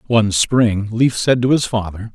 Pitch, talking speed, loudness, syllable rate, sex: 115 Hz, 195 wpm, -16 LUFS, 4.7 syllables/s, male